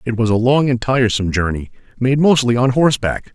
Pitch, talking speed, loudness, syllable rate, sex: 120 Hz, 195 wpm, -16 LUFS, 6.1 syllables/s, male